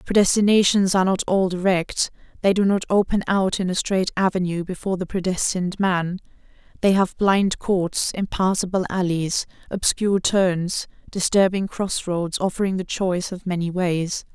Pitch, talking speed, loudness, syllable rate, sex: 185 Hz, 140 wpm, -21 LUFS, 5.0 syllables/s, female